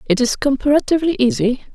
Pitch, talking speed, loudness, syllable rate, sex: 270 Hz, 140 wpm, -17 LUFS, 6.5 syllables/s, female